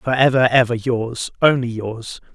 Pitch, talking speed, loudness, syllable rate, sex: 120 Hz, 155 wpm, -18 LUFS, 4.4 syllables/s, male